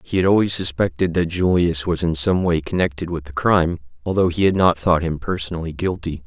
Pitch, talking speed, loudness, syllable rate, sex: 85 Hz, 210 wpm, -20 LUFS, 5.7 syllables/s, male